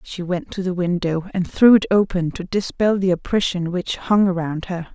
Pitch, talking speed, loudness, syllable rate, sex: 180 Hz, 205 wpm, -20 LUFS, 4.9 syllables/s, female